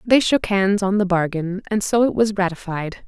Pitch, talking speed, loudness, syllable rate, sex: 195 Hz, 215 wpm, -20 LUFS, 5.0 syllables/s, female